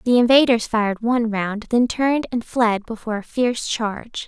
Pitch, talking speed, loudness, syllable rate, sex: 230 Hz, 185 wpm, -20 LUFS, 5.5 syllables/s, female